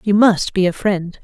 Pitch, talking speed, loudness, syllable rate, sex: 195 Hz, 245 wpm, -16 LUFS, 4.4 syllables/s, female